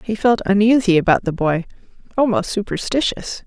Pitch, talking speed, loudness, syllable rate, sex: 200 Hz, 120 wpm, -18 LUFS, 5.3 syllables/s, female